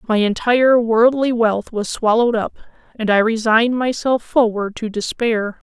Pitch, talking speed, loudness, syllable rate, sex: 225 Hz, 145 wpm, -17 LUFS, 4.8 syllables/s, female